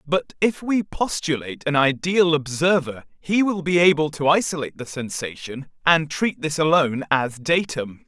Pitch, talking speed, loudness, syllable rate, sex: 155 Hz, 155 wpm, -21 LUFS, 4.8 syllables/s, male